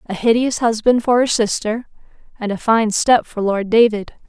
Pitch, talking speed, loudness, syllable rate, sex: 225 Hz, 180 wpm, -16 LUFS, 4.8 syllables/s, female